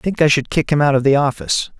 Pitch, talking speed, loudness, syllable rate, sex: 140 Hz, 335 wpm, -16 LUFS, 7.0 syllables/s, male